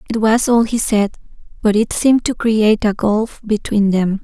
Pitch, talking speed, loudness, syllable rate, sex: 215 Hz, 200 wpm, -16 LUFS, 4.8 syllables/s, female